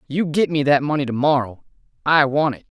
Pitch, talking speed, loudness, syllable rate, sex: 145 Hz, 215 wpm, -19 LUFS, 5.6 syllables/s, male